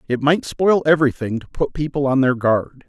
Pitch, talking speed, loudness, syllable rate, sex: 140 Hz, 210 wpm, -18 LUFS, 5.2 syllables/s, male